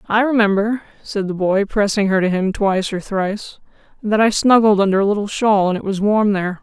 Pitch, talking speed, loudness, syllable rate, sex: 205 Hz, 215 wpm, -17 LUFS, 5.7 syllables/s, female